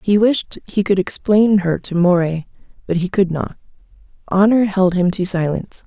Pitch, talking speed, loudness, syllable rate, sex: 190 Hz, 175 wpm, -17 LUFS, 4.8 syllables/s, female